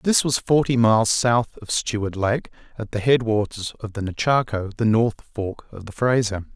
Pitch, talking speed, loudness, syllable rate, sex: 115 Hz, 185 wpm, -21 LUFS, 4.7 syllables/s, male